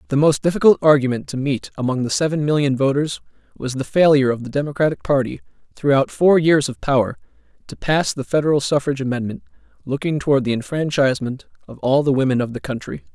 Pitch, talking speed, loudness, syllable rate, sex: 140 Hz, 185 wpm, -19 LUFS, 6.3 syllables/s, male